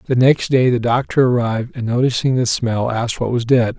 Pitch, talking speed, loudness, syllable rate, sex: 120 Hz, 220 wpm, -17 LUFS, 5.5 syllables/s, male